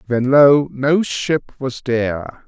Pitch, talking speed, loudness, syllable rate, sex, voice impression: 135 Hz, 145 wpm, -16 LUFS, 3.3 syllables/s, male, masculine, adult-like, clear, refreshing, sincere, slightly unique